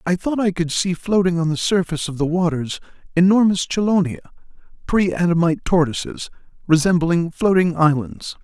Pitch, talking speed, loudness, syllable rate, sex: 175 Hz, 140 wpm, -19 LUFS, 5.4 syllables/s, male